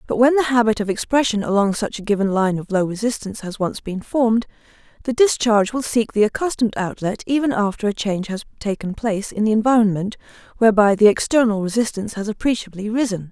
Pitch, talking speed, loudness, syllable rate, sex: 220 Hz, 190 wpm, -19 LUFS, 6.4 syllables/s, female